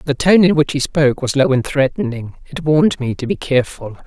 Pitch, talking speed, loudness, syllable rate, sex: 145 Hz, 235 wpm, -16 LUFS, 5.9 syllables/s, female